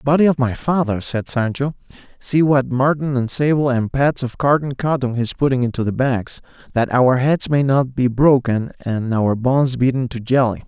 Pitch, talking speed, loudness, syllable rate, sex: 130 Hz, 195 wpm, -18 LUFS, 4.9 syllables/s, male